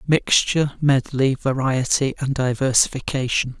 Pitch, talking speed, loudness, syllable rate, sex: 135 Hz, 85 wpm, -20 LUFS, 4.4 syllables/s, male